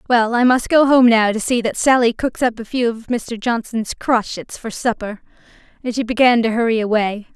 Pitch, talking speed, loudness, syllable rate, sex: 230 Hz, 210 wpm, -17 LUFS, 5.1 syllables/s, female